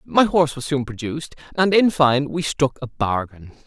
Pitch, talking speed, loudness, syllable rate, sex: 140 Hz, 195 wpm, -20 LUFS, 5.0 syllables/s, male